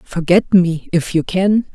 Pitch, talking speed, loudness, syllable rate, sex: 180 Hz, 170 wpm, -15 LUFS, 3.9 syllables/s, female